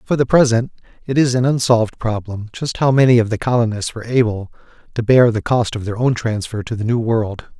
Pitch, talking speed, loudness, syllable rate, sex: 115 Hz, 220 wpm, -17 LUFS, 5.7 syllables/s, male